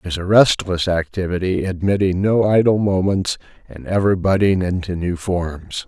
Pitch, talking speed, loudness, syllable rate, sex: 95 Hz, 155 wpm, -18 LUFS, 4.7 syllables/s, male